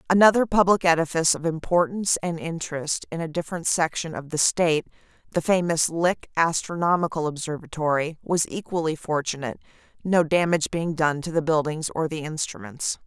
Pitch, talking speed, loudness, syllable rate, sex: 165 Hz, 145 wpm, -24 LUFS, 5.7 syllables/s, female